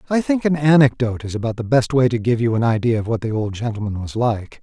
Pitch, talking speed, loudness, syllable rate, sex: 120 Hz, 275 wpm, -19 LUFS, 6.3 syllables/s, male